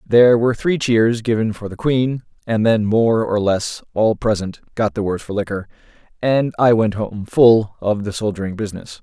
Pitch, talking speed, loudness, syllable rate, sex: 110 Hz, 195 wpm, -18 LUFS, 5.0 syllables/s, male